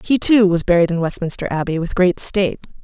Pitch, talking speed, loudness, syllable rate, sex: 185 Hz, 210 wpm, -16 LUFS, 6.0 syllables/s, female